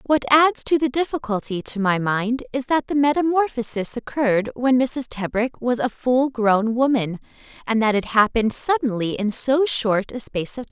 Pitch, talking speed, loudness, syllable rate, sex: 245 Hz, 185 wpm, -21 LUFS, 5.0 syllables/s, female